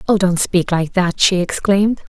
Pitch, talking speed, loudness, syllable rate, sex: 185 Hz, 195 wpm, -16 LUFS, 4.7 syllables/s, female